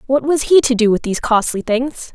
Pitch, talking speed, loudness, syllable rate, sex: 250 Hz, 250 wpm, -16 LUFS, 5.5 syllables/s, female